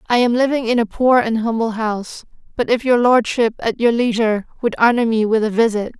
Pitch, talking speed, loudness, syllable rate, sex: 230 Hz, 220 wpm, -17 LUFS, 5.8 syllables/s, female